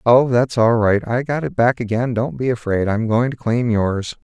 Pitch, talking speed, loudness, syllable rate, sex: 120 Hz, 210 wpm, -18 LUFS, 4.6 syllables/s, male